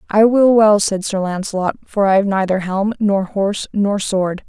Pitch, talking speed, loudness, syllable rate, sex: 200 Hz, 200 wpm, -16 LUFS, 4.7 syllables/s, female